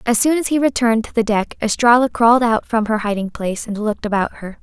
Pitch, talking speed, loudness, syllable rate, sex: 225 Hz, 245 wpm, -17 LUFS, 6.3 syllables/s, female